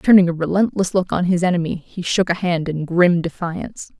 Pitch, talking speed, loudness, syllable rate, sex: 175 Hz, 210 wpm, -19 LUFS, 5.4 syllables/s, female